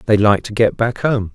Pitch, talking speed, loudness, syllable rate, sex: 110 Hz, 265 wpm, -16 LUFS, 5.0 syllables/s, male